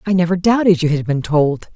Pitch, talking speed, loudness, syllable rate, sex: 170 Hz, 240 wpm, -16 LUFS, 5.6 syllables/s, female